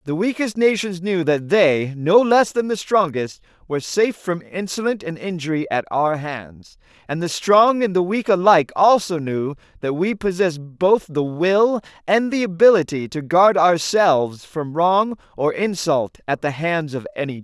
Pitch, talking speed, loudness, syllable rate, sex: 175 Hz, 175 wpm, -19 LUFS, 4.6 syllables/s, male